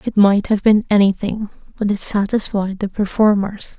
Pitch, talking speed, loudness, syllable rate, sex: 205 Hz, 160 wpm, -17 LUFS, 4.7 syllables/s, female